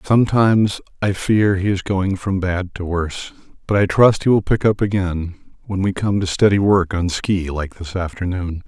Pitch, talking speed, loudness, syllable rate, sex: 95 Hz, 200 wpm, -18 LUFS, 4.8 syllables/s, male